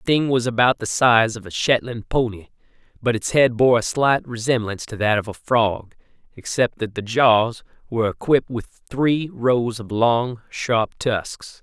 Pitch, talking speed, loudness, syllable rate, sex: 115 Hz, 180 wpm, -20 LUFS, 4.4 syllables/s, male